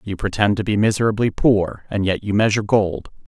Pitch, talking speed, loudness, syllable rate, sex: 100 Hz, 195 wpm, -19 LUFS, 5.6 syllables/s, male